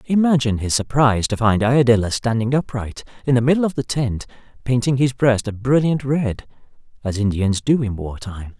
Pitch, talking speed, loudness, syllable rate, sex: 120 Hz, 180 wpm, -19 LUFS, 5.4 syllables/s, male